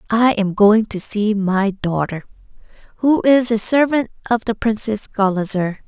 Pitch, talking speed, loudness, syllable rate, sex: 215 Hz, 155 wpm, -17 LUFS, 4.3 syllables/s, female